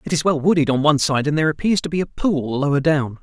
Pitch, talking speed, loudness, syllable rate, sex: 150 Hz, 295 wpm, -19 LUFS, 6.8 syllables/s, male